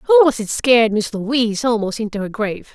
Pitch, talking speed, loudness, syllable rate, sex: 230 Hz, 220 wpm, -17 LUFS, 5.6 syllables/s, female